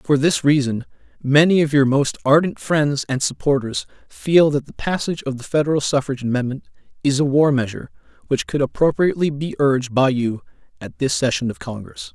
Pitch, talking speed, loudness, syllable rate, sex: 140 Hz, 180 wpm, -19 LUFS, 5.7 syllables/s, male